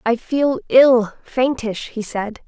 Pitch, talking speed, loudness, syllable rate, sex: 240 Hz, 120 wpm, -18 LUFS, 3.2 syllables/s, female